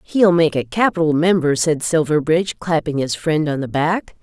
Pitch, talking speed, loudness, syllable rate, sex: 160 Hz, 185 wpm, -17 LUFS, 4.9 syllables/s, female